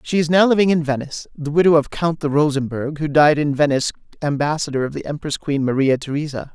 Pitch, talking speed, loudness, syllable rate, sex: 150 Hz, 210 wpm, -19 LUFS, 6.3 syllables/s, male